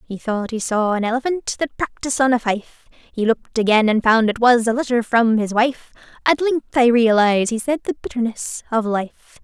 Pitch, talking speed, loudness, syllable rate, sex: 235 Hz, 210 wpm, -18 LUFS, 5.1 syllables/s, female